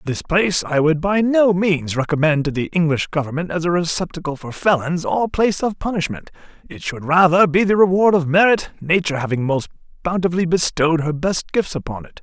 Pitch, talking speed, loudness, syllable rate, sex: 170 Hz, 190 wpm, -18 LUFS, 5.6 syllables/s, male